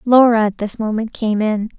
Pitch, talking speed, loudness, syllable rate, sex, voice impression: 220 Hz, 200 wpm, -17 LUFS, 5.0 syllables/s, female, very feminine, very young, very thin, tensed, powerful, very bright, soft, very clear, fluent, slightly raspy, very cute, slightly intellectual, very refreshing, sincere, calm, very friendly, reassuring, very unique, elegant, slightly wild, very sweet, lively, very kind, slightly intense, sharp, modest, very light